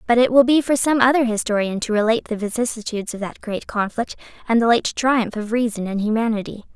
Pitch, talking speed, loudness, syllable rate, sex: 225 Hz, 215 wpm, -20 LUFS, 6.1 syllables/s, female